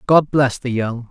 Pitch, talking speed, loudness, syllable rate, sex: 130 Hz, 220 wpm, -18 LUFS, 4.3 syllables/s, male